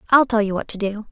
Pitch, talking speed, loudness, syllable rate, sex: 215 Hz, 320 wpm, -20 LUFS, 7.0 syllables/s, female